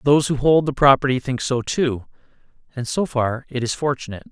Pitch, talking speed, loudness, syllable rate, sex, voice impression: 130 Hz, 195 wpm, -20 LUFS, 5.8 syllables/s, male, masculine, adult-like, slightly tensed, slightly powerful, slightly bright, slightly fluent, cool, intellectual, slightly refreshing, sincere, slightly calm